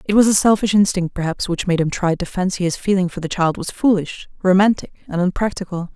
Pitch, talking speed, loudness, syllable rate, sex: 185 Hz, 220 wpm, -18 LUFS, 5.9 syllables/s, female